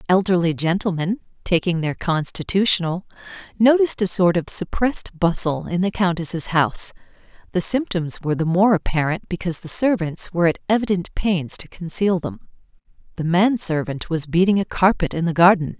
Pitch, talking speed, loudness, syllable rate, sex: 180 Hz, 155 wpm, -20 LUFS, 5.4 syllables/s, female